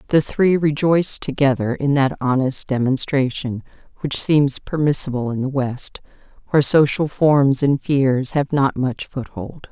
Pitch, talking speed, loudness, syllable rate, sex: 140 Hz, 140 wpm, -18 LUFS, 4.3 syllables/s, female